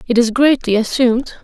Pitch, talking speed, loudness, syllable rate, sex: 240 Hz, 165 wpm, -14 LUFS, 5.5 syllables/s, female